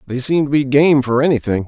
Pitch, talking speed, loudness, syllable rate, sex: 135 Hz, 250 wpm, -15 LUFS, 5.9 syllables/s, male